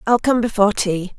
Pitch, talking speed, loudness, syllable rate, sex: 215 Hz, 205 wpm, -18 LUFS, 5.8 syllables/s, female